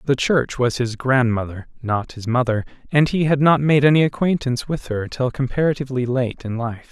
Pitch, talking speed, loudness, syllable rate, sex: 130 Hz, 190 wpm, -20 LUFS, 5.3 syllables/s, male